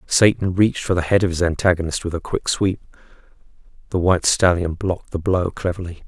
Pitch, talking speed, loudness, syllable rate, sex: 90 Hz, 190 wpm, -20 LUFS, 6.0 syllables/s, male